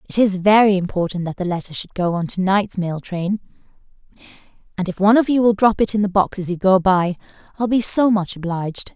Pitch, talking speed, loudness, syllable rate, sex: 195 Hz, 230 wpm, -18 LUFS, 5.9 syllables/s, female